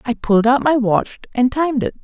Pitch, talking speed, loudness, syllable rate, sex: 250 Hz, 235 wpm, -17 LUFS, 5.8 syllables/s, female